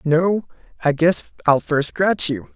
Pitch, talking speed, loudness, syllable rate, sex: 160 Hz, 165 wpm, -19 LUFS, 3.8 syllables/s, male